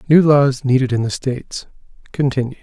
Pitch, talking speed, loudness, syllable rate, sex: 135 Hz, 160 wpm, -16 LUFS, 5.7 syllables/s, male